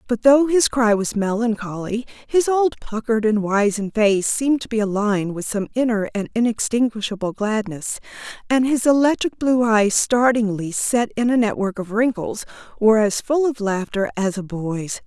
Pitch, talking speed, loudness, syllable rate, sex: 225 Hz, 165 wpm, -20 LUFS, 5.0 syllables/s, female